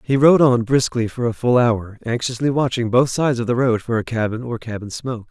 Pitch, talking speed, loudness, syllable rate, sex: 120 Hz, 240 wpm, -19 LUFS, 5.6 syllables/s, male